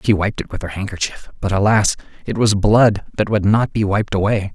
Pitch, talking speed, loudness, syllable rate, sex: 105 Hz, 225 wpm, -18 LUFS, 5.4 syllables/s, male